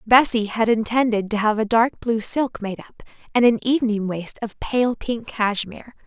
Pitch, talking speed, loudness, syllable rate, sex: 225 Hz, 190 wpm, -21 LUFS, 4.7 syllables/s, female